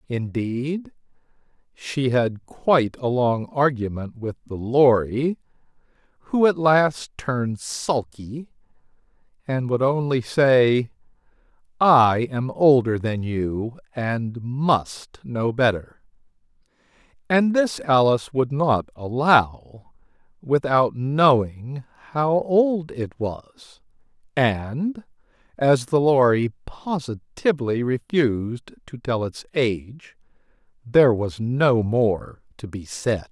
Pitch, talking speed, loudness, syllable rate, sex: 130 Hz, 105 wpm, -21 LUFS, 3.2 syllables/s, male